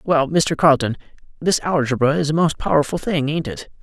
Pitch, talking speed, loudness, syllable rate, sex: 150 Hz, 175 wpm, -19 LUFS, 5.3 syllables/s, male